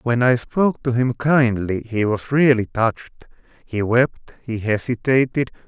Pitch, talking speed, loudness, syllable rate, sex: 120 Hz, 150 wpm, -19 LUFS, 4.5 syllables/s, male